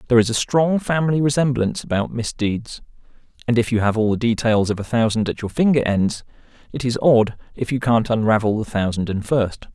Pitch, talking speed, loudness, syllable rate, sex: 115 Hz, 205 wpm, -20 LUFS, 5.8 syllables/s, male